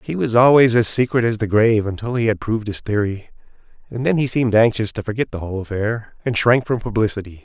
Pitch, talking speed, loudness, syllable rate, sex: 110 Hz, 225 wpm, -18 LUFS, 6.3 syllables/s, male